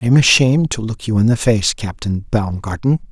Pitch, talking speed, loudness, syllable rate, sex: 115 Hz, 210 wpm, -16 LUFS, 5.4 syllables/s, male